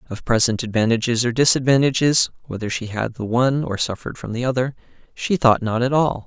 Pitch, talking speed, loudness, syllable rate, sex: 120 Hz, 170 wpm, -20 LUFS, 6.0 syllables/s, male